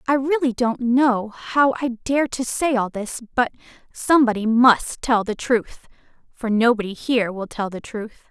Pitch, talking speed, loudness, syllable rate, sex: 240 Hz, 175 wpm, -20 LUFS, 4.4 syllables/s, female